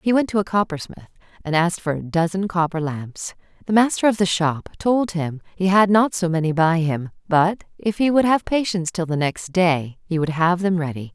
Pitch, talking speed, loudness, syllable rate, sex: 180 Hz, 220 wpm, -20 LUFS, 5.2 syllables/s, female